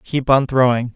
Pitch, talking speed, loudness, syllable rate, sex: 125 Hz, 190 wpm, -16 LUFS, 4.7 syllables/s, male